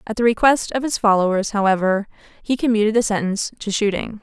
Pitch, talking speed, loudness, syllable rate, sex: 210 Hz, 185 wpm, -19 LUFS, 6.3 syllables/s, female